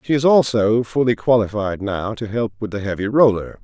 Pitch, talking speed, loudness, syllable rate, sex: 110 Hz, 200 wpm, -18 LUFS, 5.2 syllables/s, male